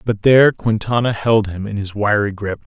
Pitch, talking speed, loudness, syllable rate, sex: 105 Hz, 195 wpm, -17 LUFS, 5.1 syllables/s, male